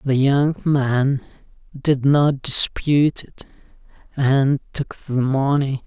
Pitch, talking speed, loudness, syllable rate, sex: 135 Hz, 115 wpm, -19 LUFS, 3.2 syllables/s, male